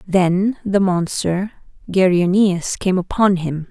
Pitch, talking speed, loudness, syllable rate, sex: 185 Hz, 115 wpm, -17 LUFS, 3.5 syllables/s, female